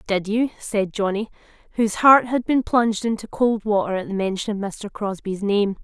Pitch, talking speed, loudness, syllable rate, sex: 210 Hz, 195 wpm, -21 LUFS, 5.1 syllables/s, female